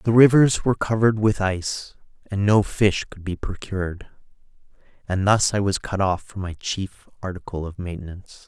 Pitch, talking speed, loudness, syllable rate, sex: 100 Hz, 170 wpm, -22 LUFS, 5.1 syllables/s, male